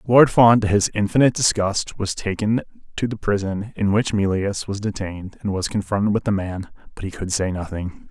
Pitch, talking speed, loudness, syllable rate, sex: 100 Hz, 200 wpm, -21 LUFS, 5.4 syllables/s, male